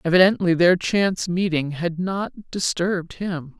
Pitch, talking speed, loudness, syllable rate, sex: 175 Hz, 135 wpm, -21 LUFS, 4.3 syllables/s, female